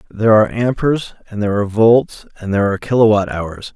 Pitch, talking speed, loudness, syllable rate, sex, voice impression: 105 Hz, 190 wpm, -15 LUFS, 6.7 syllables/s, male, masculine, adult-like, slightly soft, cool, slightly refreshing, sincere, slightly elegant